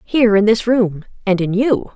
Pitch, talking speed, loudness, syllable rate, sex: 215 Hz, 215 wpm, -16 LUFS, 4.9 syllables/s, female